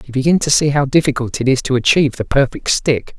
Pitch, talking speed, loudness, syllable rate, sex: 135 Hz, 245 wpm, -15 LUFS, 6.2 syllables/s, male